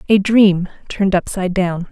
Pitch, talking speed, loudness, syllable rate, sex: 190 Hz, 155 wpm, -16 LUFS, 5.2 syllables/s, female